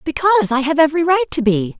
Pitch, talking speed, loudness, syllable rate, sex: 295 Hz, 235 wpm, -15 LUFS, 7.4 syllables/s, female